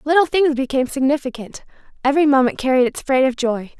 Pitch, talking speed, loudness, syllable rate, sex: 270 Hz, 175 wpm, -18 LUFS, 6.4 syllables/s, female